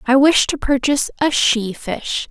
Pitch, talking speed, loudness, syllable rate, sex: 265 Hz, 180 wpm, -17 LUFS, 4.4 syllables/s, female